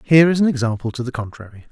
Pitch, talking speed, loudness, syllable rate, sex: 130 Hz, 245 wpm, -18 LUFS, 7.5 syllables/s, male